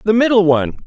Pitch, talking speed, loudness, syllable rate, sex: 190 Hz, 210 wpm, -14 LUFS, 7.3 syllables/s, male